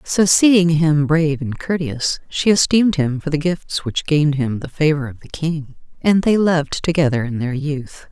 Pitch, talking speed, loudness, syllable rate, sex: 155 Hz, 200 wpm, -18 LUFS, 4.7 syllables/s, female